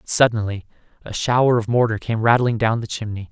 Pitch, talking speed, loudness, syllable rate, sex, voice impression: 115 Hz, 180 wpm, -19 LUFS, 5.6 syllables/s, male, masculine, adult-like, tensed, powerful, bright, clear, cool, intellectual, friendly, reassuring, slightly lively, kind